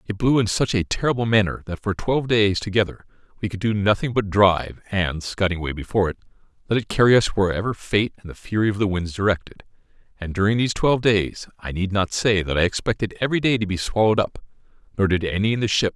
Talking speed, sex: 245 wpm, male